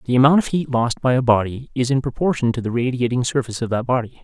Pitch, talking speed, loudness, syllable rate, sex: 125 Hz, 255 wpm, -19 LUFS, 6.7 syllables/s, male